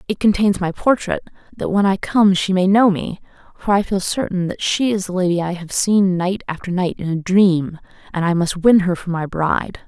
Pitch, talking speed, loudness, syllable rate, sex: 185 Hz, 230 wpm, -18 LUFS, 5.1 syllables/s, female